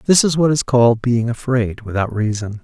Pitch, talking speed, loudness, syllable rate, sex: 120 Hz, 205 wpm, -17 LUFS, 5.3 syllables/s, male